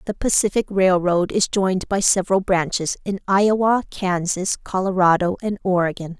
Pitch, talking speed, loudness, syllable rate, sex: 190 Hz, 135 wpm, -20 LUFS, 5.1 syllables/s, female